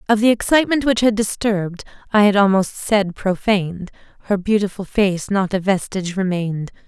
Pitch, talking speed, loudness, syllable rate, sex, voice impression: 200 Hz, 140 wpm, -18 LUFS, 5.4 syllables/s, female, feminine, adult-like, fluent, sincere, slightly friendly